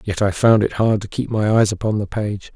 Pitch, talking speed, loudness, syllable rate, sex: 105 Hz, 280 wpm, -18 LUFS, 5.3 syllables/s, male